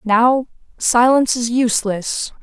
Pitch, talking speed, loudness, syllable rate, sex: 240 Hz, 100 wpm, -16 LUFS, 4.1 syllables/s, female